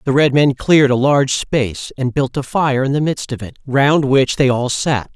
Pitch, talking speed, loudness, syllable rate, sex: 135 Hz, 245 wpm, -16 LUFS, 4.9 syllables/s, male